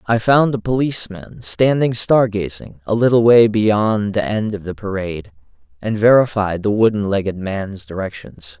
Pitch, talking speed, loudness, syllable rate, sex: 105 Hz, 160 wpm, -17 LUFS, 4.7 syllables/s, male